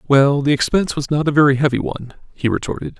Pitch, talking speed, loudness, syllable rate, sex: 140 Hz, 220 wpm, -17 LUFS, 6.8 syllables/s, male